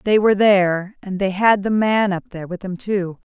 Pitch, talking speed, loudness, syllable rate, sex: 195 Hz, 235 wpm, -18 LUFS, 5.5 syllables/s, female